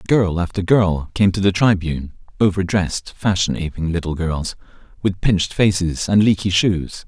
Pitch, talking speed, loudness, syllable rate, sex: 95 Hz, 155 wpm, -19 LUFS, 4.8 syllables/s, male